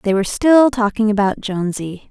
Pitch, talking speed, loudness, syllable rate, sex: 215 Hz, 170 wpm, -16 LUFS, 5.5 syllables/s, female